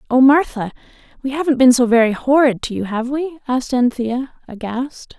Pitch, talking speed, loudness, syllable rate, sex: 255 Hz, 175 wpm, -17 LUFS, 5.2 syllables/s, female